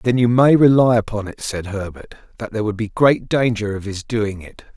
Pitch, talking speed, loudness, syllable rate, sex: 110 Hz, 225 wpm, -18 LUFS, 5.1 syllables/s, male